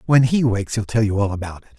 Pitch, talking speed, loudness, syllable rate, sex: 110 Hz, 305 wpm, -19 LUFS, 7.0 syllables/s, male